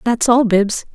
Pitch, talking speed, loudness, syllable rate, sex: 225 Hz, 190 wpm, -15 LUFS, 3.9 syllables/s, female